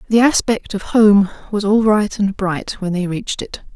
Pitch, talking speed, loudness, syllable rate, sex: 205 Hz, 210 wpm, -16 LUFS, 4.6 syllables/s, female